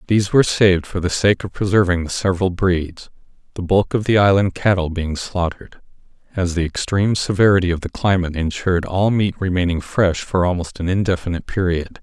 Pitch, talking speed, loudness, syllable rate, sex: 95 Hz, 180 wpm, -18 LUFS, 5.9 syllables/s, male